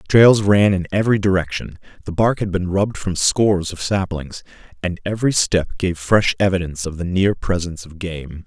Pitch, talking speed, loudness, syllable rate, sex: 95 Hz, 185 wpm, -19 LUFS, 5.4 syllables/s, male